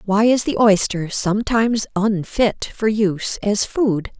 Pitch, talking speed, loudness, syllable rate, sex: 210 Hz, 145 wpm, -18 LUFS, 4.1 syllables/s, female